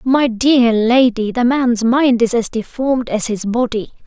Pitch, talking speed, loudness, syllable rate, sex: 235 Hz, 175 wpm, -15 LUFS, 4.2 syllables/s, female